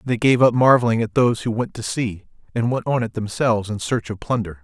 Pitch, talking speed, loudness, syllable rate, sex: 115 Hz, 245 wpm, -20 LUFS, 5.9 syllables/s, male